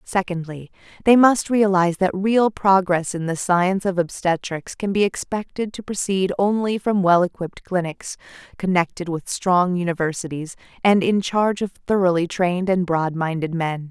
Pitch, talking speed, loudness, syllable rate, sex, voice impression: 185 Hz, 155 wpm, -20 LUFS, 4.9 syllables/s, female, feminine, very adult-like, slightly fluent, slightly intellectual, slightly calm, elegant